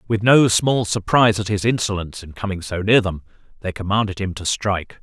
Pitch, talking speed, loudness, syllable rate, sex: 100 Hz, 205 wpm, -19 LUFS, 5.8 syllables/s, male